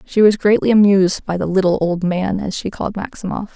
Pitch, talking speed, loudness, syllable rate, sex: 195 Hz, 220 wpm, -17 LUFS, 5.8 syllables/s, female